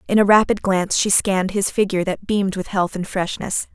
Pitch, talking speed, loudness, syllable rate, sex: 195 Hz, 225 wpm, -19 LUFS, 5.9 syllables/s, female